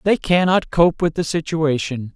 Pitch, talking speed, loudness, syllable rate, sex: 160 Hz, 165 wpm, -18 LUFS, 4.4 syllables/s, male